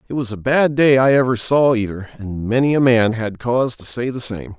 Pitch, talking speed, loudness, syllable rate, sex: 120 Hz, 250 wpm, -17 LUFS, 5.3 syllables/s, male